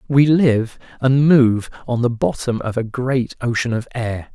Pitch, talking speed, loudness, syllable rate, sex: 125 Hz, 180 wpm, -18 LUFS, 4.1 syllables/s, male